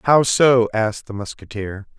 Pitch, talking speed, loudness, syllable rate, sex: 115 Hz, 150 wpm, -18 LUFS, 4.5 syllables/s, male